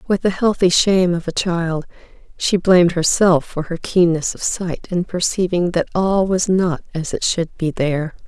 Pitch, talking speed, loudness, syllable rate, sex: 175 Hz, 190 wpm, -18 LUFS, 4.6 syllables/s, female